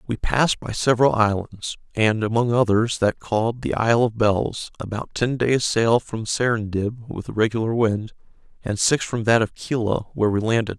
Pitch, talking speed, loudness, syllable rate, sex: 115 Hz, 185 wpm, -21 LUFS, 5.0 syllables/s, male